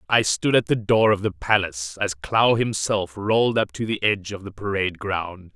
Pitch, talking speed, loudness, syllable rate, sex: 100 Hz, 215 wpm, -22 LUFS, 5.1 syllables/s, male